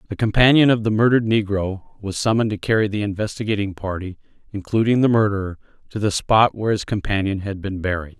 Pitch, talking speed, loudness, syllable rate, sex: 105 Hz, 185 wpm, -20 LUFS, 6.4 syllables/s, male